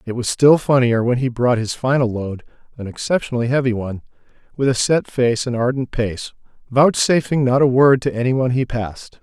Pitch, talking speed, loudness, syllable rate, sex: 125 Hz, 190 wpm, -18 LUFS, 4.6 syllables/s, male